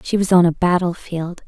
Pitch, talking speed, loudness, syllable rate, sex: 175 Hz, 205 wpm, -17 LUFS, 5.2 syllables/s, female